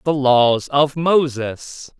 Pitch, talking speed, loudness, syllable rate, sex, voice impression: 135 Hz, 120 wpm, -17 LUFS, 2.7 syllables/s, male, masculine, adult-like, middle-aged, slightly thick, tensed, slightly powerful, slightly bright, slightly hard, clear, fluent, slightly cool, very intellectual, sincere, calm, slightly mature, slightly friendly, slightly reassuring, slightly unique, elegant, slightly sweet, slightly lively, slightly kind, slightly modest